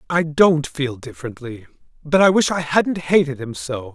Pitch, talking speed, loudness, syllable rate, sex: 150 Hz, 185 wpm, -18 LUFS, 4.7 syllables/s, male